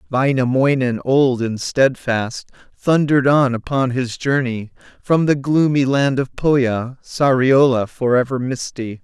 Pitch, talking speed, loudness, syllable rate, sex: 130 Hz, 125 wpm, -17 LUFS, 4.1 syllables/s, male